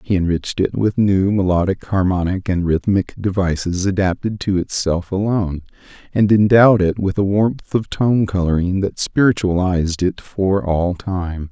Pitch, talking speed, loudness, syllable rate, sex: 95 Hz, 150 wpm, -18 LUFS, 4.7 syllables/s, male